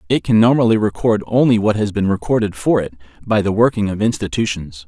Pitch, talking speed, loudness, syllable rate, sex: 110 Hz, 195 wpm, -16 LUFS, 6.0 syllables/s, male